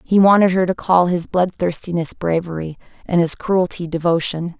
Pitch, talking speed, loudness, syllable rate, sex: 175 Hz, 155 wpm, -18 LUFS, 5.0 syllables/s, female